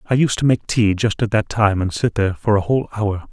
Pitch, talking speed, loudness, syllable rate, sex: 105 Hz, 290 wpm, -18 LUFS, 5.8 syllables/s, male